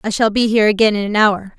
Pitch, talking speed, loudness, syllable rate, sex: 210 Hz, 305 wpm, -15 LUFS, 6.7 syllables/s, female